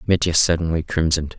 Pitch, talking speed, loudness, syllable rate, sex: 80 Hz, 130 wpm, -19 LUFS, 6.4 syllables/s, male